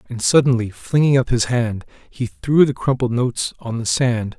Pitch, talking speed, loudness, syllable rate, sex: 120 Hz, 190 wpm, -18 LUFS, 4.7 syllables/s, male